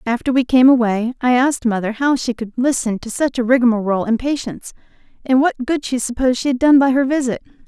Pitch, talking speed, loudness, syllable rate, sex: 250 Hz, 220 wpm, -17 LUFS, 6.2 syllables/s, female